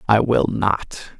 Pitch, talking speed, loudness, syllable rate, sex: 105 Hz, 150 wpm, -19 LUFS, 3.1 syllables/s, male